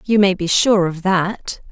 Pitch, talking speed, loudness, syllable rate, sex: 190 Hz, 210 wpm, -16 LUFS, 3.9 syllables/s, female